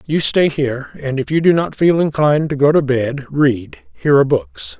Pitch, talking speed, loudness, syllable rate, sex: 145 Hz, 215 wpm, -16 LUFS, 5.2 syllables/s, male